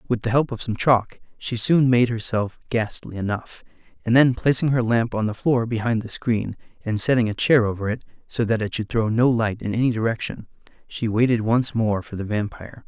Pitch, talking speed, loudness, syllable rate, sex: 115 Hz, 215 wpm, -22 LUFS, 5.3 syllables/s, male